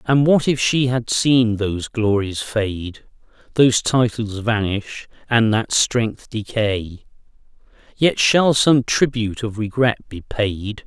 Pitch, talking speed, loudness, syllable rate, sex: 115 Hz, 135 wpm, -19 LUFS, 3.7 syllables/s, male